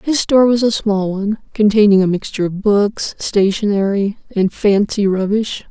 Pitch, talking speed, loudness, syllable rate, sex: 205 Hz, 160 wpm, -15 LUFS, 4.9 syllables/s, female